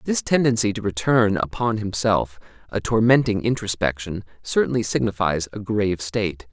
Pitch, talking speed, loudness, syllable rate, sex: 105 Hz, 130 wpm, -22 LUFS, 5.1 syllables/s, male